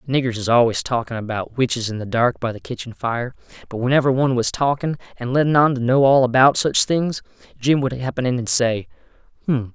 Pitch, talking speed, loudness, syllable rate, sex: 125 Hz, 210 wpm, -19 LUFS, 5.8 syllables/s, male